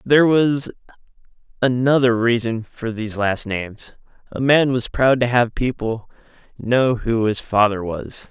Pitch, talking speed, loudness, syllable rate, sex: 120 Hz, 145 wpm, -19 LUFS, 4.3 syllables/s, male